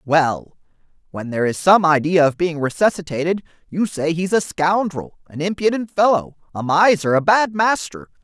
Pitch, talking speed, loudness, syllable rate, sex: 170 Hz, 160 wpm, -18 LUFS, 4.8 syllables/s, male